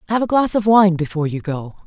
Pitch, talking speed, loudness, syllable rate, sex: 185 Hz, 260 wpm, -17 LUFS, 6.4 syllables/s, female